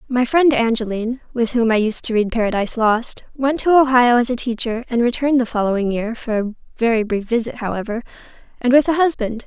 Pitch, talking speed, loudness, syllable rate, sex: 235 Hz, 195 wpm, -18 LUFS, 6.0 syllables/s, female